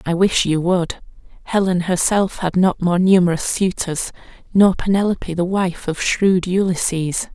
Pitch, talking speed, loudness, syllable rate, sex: 180 Hz, 145 wpm, -18 LUFS, 4.4 syllables/s, female